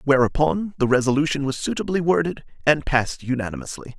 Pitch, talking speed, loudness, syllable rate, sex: 140 Hz, 135 wpm, -22 LUFS, 6.1 syllables/s, male